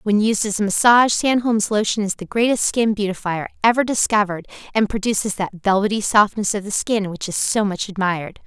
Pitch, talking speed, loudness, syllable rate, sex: 210 Hz, 190 wpm, -19 LUFS, 5.7 syllables/s, female